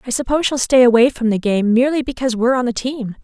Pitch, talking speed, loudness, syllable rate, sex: 245 Hz, 295 wpm, -16 LUFS, 7.9 syllables/s, female